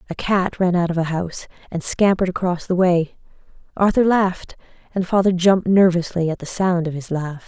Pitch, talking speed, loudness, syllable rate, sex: 180 Hz, 195 wpm, -19 LUFS, 5.6 syllables/s, female